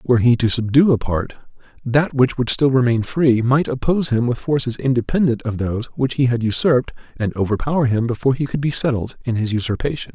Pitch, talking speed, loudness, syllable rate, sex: 125 Hz, 205 wpm, -18 LUFS, 6.0 syllables/s, male